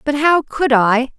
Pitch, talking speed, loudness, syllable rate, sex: 270 Hz, 205 wpm, -15 LUFS, 3.8 syllables/s, female